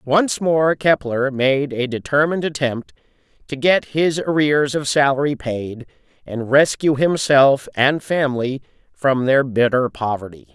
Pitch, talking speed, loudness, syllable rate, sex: 140 Hz, 130 wpm, -18 LUFS, 4.2 syllables/s, male